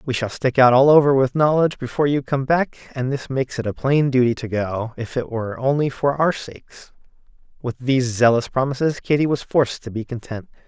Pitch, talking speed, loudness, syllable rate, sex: 130 Hz, 215 wpm, -20 LUFS, 5.8 syllables/s, male